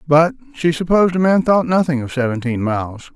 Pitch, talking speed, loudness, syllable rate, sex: 155 Hz, 190 wpm, -17 LUFS, 5.7 syllables/s, male